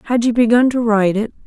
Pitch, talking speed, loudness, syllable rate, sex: 230 Hz, 245 wpm, -15 LUFS, 6.9 syllables/s, female